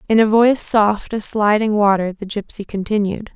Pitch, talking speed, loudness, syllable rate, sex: 210 Hz, 180 wpm, -17 LUFS, 5.1 syllables/s, female